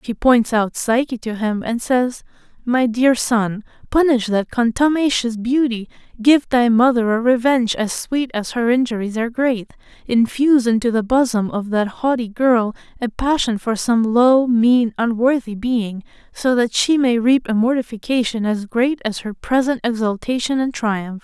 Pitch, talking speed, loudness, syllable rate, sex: 235 Hz, 165 wpm, -18 LUFS, 4.5 syllables/s, female